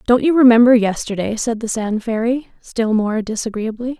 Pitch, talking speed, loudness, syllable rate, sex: 230 Hz, 165 wpm, -17 LUFS, 5.1 syllables/s, female